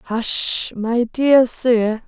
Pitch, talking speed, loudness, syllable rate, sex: 235 Hz, 115 wpm, -17 LUFS, 2.2 syllables/s, female